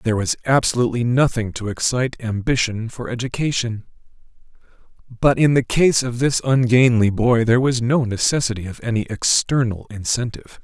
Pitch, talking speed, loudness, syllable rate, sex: 120 Hz, 140 wpm, -19 LUFS, 5.6 syllables/s, male